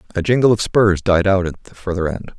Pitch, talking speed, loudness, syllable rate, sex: 95 Hz, 250 wpm, -17 LUFS, 5.9 syllables/s, male